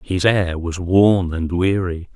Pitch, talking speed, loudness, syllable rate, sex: 90 Hz, 165 wpm, -18 LUFS, 3.5 syllables/s, male